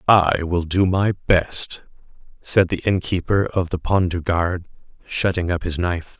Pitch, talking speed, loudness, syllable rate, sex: 90 Hz, 175 wpm, -20 LUFS, 4.2 syllables/s, male